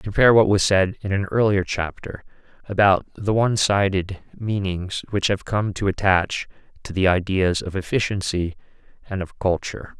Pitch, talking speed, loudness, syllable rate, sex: 95 Hz, 155 wpm, -21 LUFS, 4.9 syllables/s, male